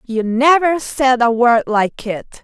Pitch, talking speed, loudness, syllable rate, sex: 250 Hz, 175 wpm, -15 LUFS, 3.6 syllables/s, female